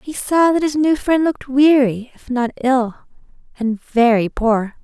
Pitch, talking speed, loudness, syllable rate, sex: 260 Hz, 175 wpm, -17 LUFS, 4.3 syllables/s, female